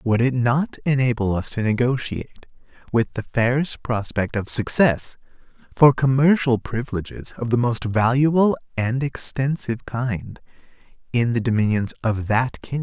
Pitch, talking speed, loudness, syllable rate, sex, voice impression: 120 Hz, 135 wpm, -21 LUFS, 4.7 syllables/s, male, very masculine, slightly old, very thick, tensed, very powerful, bright, very soft, muffled, fluent, slightly raspy, very cool, very intellectual, refreshing, sincere, very calm, very friendly, very reassuring, very unique, elegant, wild, very sweet, lively, very kind, slightly modest